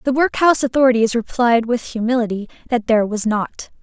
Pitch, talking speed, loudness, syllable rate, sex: 235 Hz, 155 wpm, -17 LUFS, 5.9 syllables/s, female